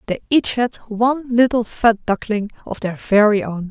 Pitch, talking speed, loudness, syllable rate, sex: 225 Hz, 180 wpm, -18 LUFS, 4.5 syllables/s, female